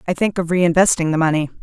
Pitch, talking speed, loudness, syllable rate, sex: 170 Hz, 220 wpm, -17 LUFS, 6.6 syllables/s, female